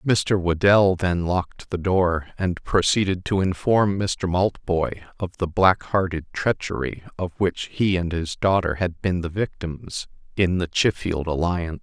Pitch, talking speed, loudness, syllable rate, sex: 90 Hz, 155 wpm, -23 LUFS, 4.1 syllables/s, male